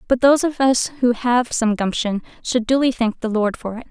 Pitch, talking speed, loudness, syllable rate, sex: 240 Hz, 230 wpm, -19 LUFS, 5.3 syllables/s, female